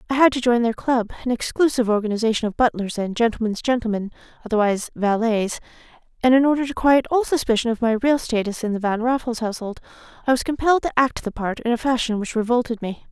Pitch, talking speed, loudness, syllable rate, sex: 235 Hz, 190 wpm, -21 LUFS, 6.5 syllables/s, female